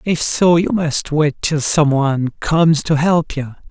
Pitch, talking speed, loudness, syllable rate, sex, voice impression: 155 Hz, 195 wpm, -16 LUFS, 4.1 syllables/s, male, masculine, adult-like, slightly thin, tensed, powerful, bright, soft, intellectual, slightly refreshing, friendly, lively, kind, slightly light